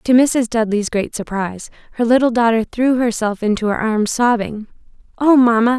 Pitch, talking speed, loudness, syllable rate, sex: 230 Hz, 165 wpm, -16 LUFS, 5.1 syllables/s, female